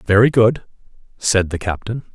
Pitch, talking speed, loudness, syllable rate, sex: 110 Hz, 140 wpm, -17 LUFS, 4.6 syllables/s, male